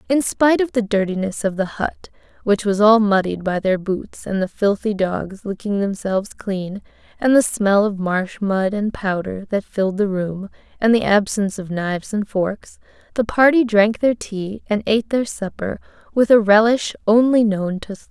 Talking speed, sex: 190 wpm, female